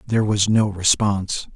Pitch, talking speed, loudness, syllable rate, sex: 105 Hz, 155 wpm, -19 LUFS, 5.0 syllables/s, male